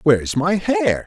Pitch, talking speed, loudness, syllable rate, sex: 150 Hz, 170 wpm, -18 LUFS, 4.1 syllables/s, male